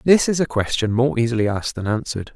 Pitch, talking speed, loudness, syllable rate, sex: 120 Hz, 230 wpm, -20 LUFS, 6.7 syllables/s, male